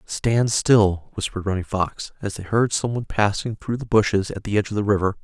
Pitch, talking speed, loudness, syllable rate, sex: 105 Hz, 230 wpm, -22 LUFS, 5.6 syllables/s, male